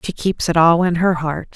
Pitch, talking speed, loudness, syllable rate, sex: 170 Hz, 270 wpm, -17 LUFS, 5.0 syllables/s, female